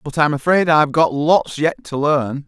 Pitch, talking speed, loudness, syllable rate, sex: 150 Hz, 220 wpm, -16 LUFS, 4.6 syllables/s, male